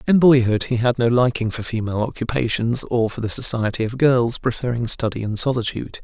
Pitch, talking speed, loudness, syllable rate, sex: 120 Hz, 190 wpm, -19 LUFS, 5.8 syllables/s, male